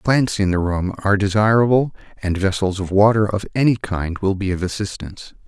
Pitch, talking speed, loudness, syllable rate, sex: 100 Hz, 185 wpm, -19 LUFS, 5.5 syllables/s, male